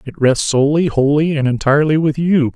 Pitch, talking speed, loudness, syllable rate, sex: 145 Hz, 190 wpm, -15 LUFS, 5.7 syllables/s, male